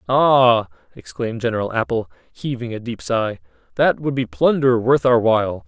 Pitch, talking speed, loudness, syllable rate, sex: 115 Hz, 160 wpm, -19 LUFS, 4.8 syllables/s, male